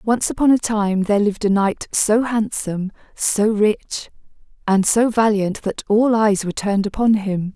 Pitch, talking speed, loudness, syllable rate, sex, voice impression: 210 Hz, 175 wpm, -18 LUFS, 4.9 syllables/s, female, feminine, slightly adult-like, slightly fluent, slightly intellectual, slightly calm